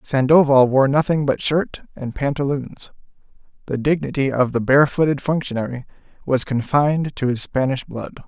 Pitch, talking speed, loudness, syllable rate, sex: 135 Hz, 140 wpm, -19 LUFS, 5.1 syllables/s, male